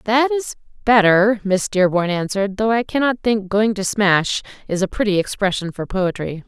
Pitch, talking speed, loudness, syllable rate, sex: 205 Hz, 175 wpm, -18 LUFS, 4.9 syllables/s, female